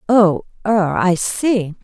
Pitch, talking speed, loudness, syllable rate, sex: 195 Hz, 100 wpm, -17 LUFS, 2.8 syllables/s, female